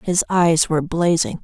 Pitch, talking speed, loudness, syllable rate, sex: 165 Hz, 165 wpm, -18 LUFS, 4.7 syllables/s, female